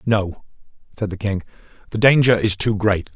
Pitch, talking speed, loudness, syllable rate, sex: 105 Hz, 170 wpm, -19 LUFS, 5.0 syllables/s, male